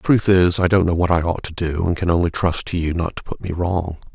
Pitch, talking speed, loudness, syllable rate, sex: 85 Hz, 320 wpm, -19 LUFS, 5.8 syllables/s, male